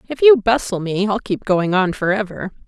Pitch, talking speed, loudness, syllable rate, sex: 210 Hz, 225 wpm, -17 LUFS, 5.1 syllables/s, female